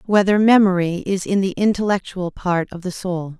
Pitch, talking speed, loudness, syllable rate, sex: 190 Hz, 175 wpm, -19 LUFS, 4.9 syllables/s, female